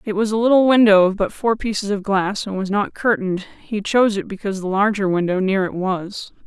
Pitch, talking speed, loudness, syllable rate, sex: 200 Hz, 230 wpm, -19 LUFS, 5.7 syllables/s, female